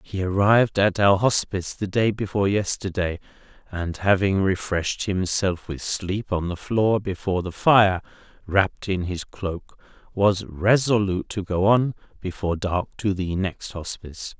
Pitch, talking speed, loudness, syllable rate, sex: 95 Hz, 150 wpm, -23 LUFS, 4.6 syllables/s, male